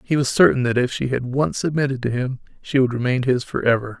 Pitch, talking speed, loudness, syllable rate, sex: 130 Hz, 255 wpm, -20 LUFS, 6.0 syllables/s, male